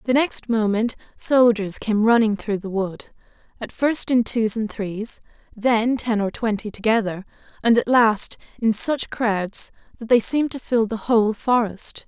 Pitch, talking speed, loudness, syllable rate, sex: 225 Hz, 170 wpm, -21 LUFS, 4.3 syllables/s, female